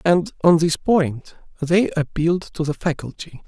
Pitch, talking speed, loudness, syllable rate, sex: 165 Hz, 155 wpm, -20 LUFS, 4.6 syllables/s, male